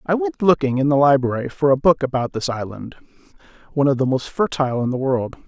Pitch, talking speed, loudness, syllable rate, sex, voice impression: 140 Hz, 220 wpm, -19 LUFS, 6.2 syllables/s, male, masculine, middle-aged, thin, clear, fluent, sincere, slightly calm, slightly mature, friendly, reassuring, unique, slightly wild, slightly kind